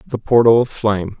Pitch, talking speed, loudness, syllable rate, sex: 110 Hz, 200 wpm, -15 LUFS, 5.6 syllables/s, male